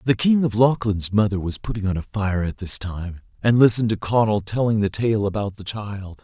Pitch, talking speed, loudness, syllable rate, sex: 105 Hz, 220 wpm, -21 LUFS, 5.3 syllables/s, male